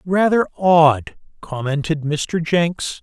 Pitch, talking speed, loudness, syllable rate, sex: 165 Hz, 100 wpm, -18 LUFS, 3.1 syllables/s, male